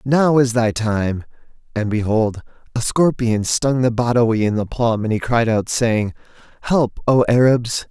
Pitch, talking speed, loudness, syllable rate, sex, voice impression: 115 Hz, 165 wpm, -18 LUFS, 4.2 syllables/s, male, very masculine, adult-like, thick, slightly relaxed, weak, dark, slightly soft, clear, slightly fluent, cool, intellectual, slightly refreshing, very sincere, very calm, mature, friendly, reassuring, unique, slightly elegant, slightly wild, sweet, slightly lively, kind, slightly modest